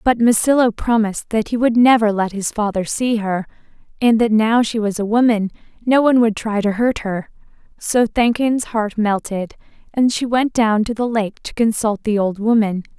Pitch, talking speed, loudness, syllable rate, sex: 220 Hz, 195 wpm, -17 LUFS, 5.0 syllables/s, female